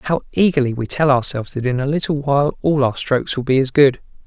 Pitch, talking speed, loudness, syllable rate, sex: 135 Hz, 240 wpm, -17 LUFS, 6.2 syllables/s, male